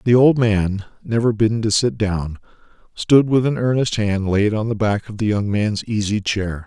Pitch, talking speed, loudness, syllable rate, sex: 110 Hz, 205 wpm, -19 LUFS, 4.7 syllables/s, male